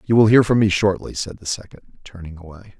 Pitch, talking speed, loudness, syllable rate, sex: 100 Hz, 235 wpm, -18 LUFS, 6.1 syllables/s, male